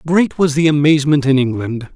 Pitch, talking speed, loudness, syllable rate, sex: 145 Hz, 185 wpm, -14 LUFS, 5.7 syllables/s, male